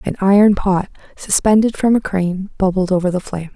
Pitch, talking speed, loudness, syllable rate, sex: 195 Hz, 185 wpm, -16 LUFS, 5.8 syllables/s, female